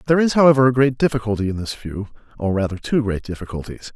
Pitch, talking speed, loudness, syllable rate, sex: 115 Hz, 210 wpm, -19 LUFS, 6.9 syllables/s, male